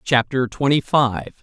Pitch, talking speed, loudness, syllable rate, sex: 130 Hz, 125 wpm, -19 LUFS, 3.9 syllables/s, male